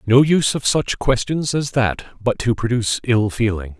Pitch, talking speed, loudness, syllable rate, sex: 120 Hz, 190 wpm, -19 LUFS, 4.9 syllables/s, male